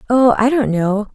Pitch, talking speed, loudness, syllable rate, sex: 230 Hz, 210 wpm, -15 LUFS, 4.6 syllables/s, female